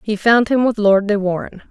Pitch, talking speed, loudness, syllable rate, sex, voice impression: 210 Hz, 245 wpm, -16 LUFS, 5.8 syllables/s, female, feminine, adult-like, tensed, powerful, slightly hard, clear, fluent, calm, slightly friendly, elegant, lively, slightly strict, slightly intense, sharp